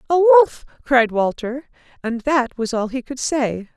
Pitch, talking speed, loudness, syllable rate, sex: 260 Hz, 175 wpm, -18 LUFS, 4.1 syllables/s, female